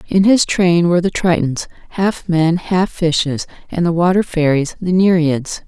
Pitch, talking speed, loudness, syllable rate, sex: 170 Hz, 170 wpm, -15 LUFS, 4.4 syllables/s, female